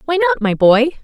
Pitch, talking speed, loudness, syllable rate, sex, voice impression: 285 Hz, 230 wpm, -14 LUFS, 8.7 syllables/s, female, feminine, young, tensed, slightly powerful, clear, intellectual, sharp